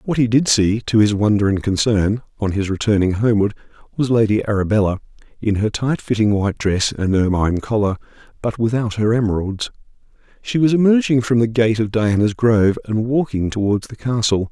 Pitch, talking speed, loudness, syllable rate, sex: 110 Hz, 180 wpm, -18 LUFS, 5.6 syllables/s, male